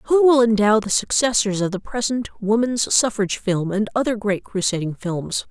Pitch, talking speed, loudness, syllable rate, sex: 215 Hz, 175 wpm, -20 LUFS, 4.8 syllables/s, female